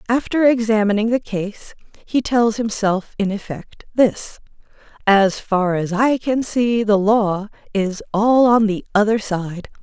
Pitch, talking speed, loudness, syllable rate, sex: 215 Hz, 145 wpm, -18 LUFS, 3.8 syllables/s, female